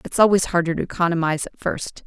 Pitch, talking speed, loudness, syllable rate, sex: 175 Hz, 205 wpm, -21 LUFS, 6.6 syllables/s, female